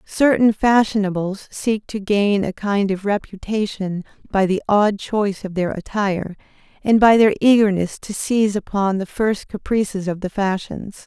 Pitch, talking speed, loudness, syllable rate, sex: 200 Hz, 155 wpm, -19 LUFS, 4.6 syllables/s, female